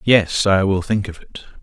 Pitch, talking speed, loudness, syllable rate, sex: 100 Hz, 220 wpm, -17 LUFS, 4.4 syllables/s, male